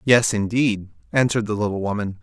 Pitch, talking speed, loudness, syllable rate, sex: 110 Hz, 160 wpm, -21 LUFS, 5.8 syllables/s, male